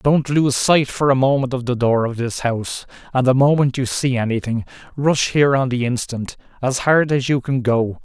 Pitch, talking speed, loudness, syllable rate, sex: 130 Hz, 215 wpm, -18 LUFS, 5.0 syllables/s, male